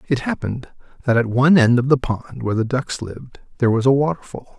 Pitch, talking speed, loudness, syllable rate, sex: 130 Hz, 220 wpm, -19 LUFS, 6.4 syllables/s, male